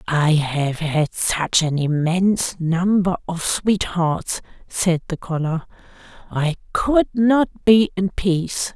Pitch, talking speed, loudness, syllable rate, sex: 175 Hz, 125 wpm, -20 LUFS, 3.4 syllables/s, female